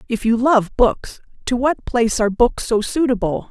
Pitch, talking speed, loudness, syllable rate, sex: 235 Hz, 190 wpm, -18 LUFS, 4.9 syllables/s, female